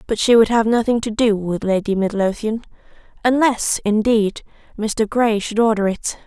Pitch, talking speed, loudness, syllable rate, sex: 220 Hz, 165 wpm, -18 LUFS, 4.7 syllables/s, female